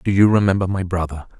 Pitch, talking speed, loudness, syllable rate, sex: 95 Hz, 215 wpm, -18 LUFS, 6.7 syllables/s, male